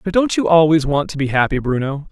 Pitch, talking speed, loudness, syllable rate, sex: 160 Hz, 255 wpm, -16 LUFS, 6.0 syllables/s, male